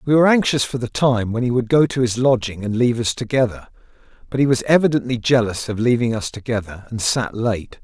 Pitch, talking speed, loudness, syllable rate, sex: 120 Hz, 220 wpm, -19 LUFS, 5.9 syllables/s, male